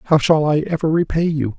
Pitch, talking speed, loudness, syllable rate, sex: 155 Hz, 225 wpm, -17 LUFS, 5.8 syllables/s, male